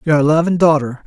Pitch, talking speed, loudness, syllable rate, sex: 155 Hz, 170 wpm, -14 LUFS, 5.2 syllables/s, male